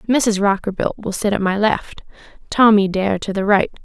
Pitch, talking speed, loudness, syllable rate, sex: 205 Hz, 170 wpm, -17 LUFS, 4.9 syllables/s, female